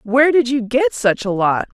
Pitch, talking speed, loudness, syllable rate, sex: 245 Hz, 235 wpm, -16 LUFS, 4.8 syllables/s, female